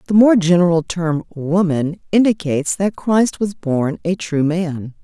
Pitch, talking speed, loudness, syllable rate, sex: 175 Hz, 155 wpm, -17 LUFS, 4.2 syllables/s, female